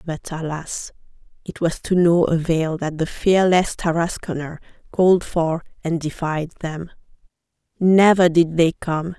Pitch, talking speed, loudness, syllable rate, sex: 165 Hz, 130 wpm, -20 LUFS, 4.1 syllables/s, female